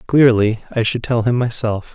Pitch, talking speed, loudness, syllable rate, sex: 115 Hz, 185 wpm, -17 LUFS, 4.6 syllables/s, male